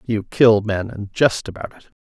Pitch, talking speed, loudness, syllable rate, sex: 110 Hz, 205 wpm, -18 LUFS, 4.4 syllables/s, male